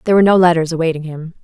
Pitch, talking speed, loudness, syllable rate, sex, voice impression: 170 Hz, 250 wpm, -14 LUFS, 8.8 syllables/s, female, very feminine, slightly young, very adult-like, slightly thin, slightly relaxed, slightly weak, dark, hard, very clear, very fluent, slightly cute, cool, very intellectual, very refreshing, sincere, calm, very friendly, very reassuring, very elegant, slightly wild, very sweet, slightly lively, kind, slightly intense, modest, light